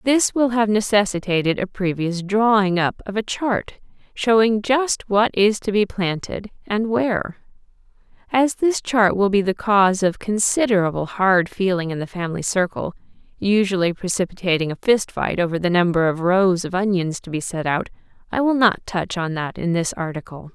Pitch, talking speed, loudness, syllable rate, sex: 195 Hz, 175 wpm, -20 LUFS, 4.9 syllables/s, female